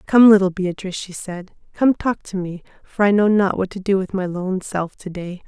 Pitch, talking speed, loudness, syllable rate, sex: 190 Hz, 230 wpm, -19 LUFS, 5.1 syllables/s, female